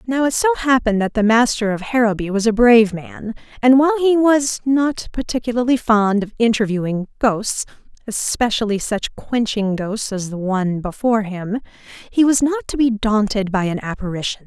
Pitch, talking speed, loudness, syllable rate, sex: 225 Hz, 170 wpm, -18 LUFS, 5.2 syllables/s, female